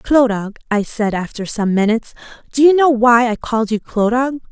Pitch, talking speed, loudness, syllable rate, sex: 235 Hz, 175 wpm, -16 LUFS, 5.1 syllables/s, female